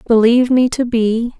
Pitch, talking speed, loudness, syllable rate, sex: 235 Hz, 170 wpm, -14 LUFS, 5.0 syllables/s, female